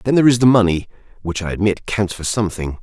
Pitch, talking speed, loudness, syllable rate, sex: 100 Hz, 235 wpm, -17 LUFS, 6.9 syllables/s, male